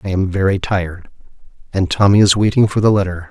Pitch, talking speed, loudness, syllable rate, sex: 95 Hz, 200 wpm, -15 LUFS, 6.2 syllables/s, male